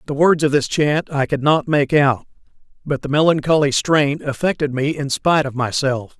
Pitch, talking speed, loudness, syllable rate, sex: 145 Hz, 195 wpm, -18 LUFS, 5.0 syllables/s, male